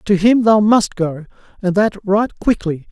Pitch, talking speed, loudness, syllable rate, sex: 200 Hz, 185 wpm, -15 LUFS, 4.1 syllables/s, male